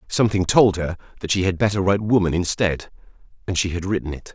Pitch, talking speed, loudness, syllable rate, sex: 95 Hz, 205 wpm, -20 LUFS, 6.5 syllables/s, male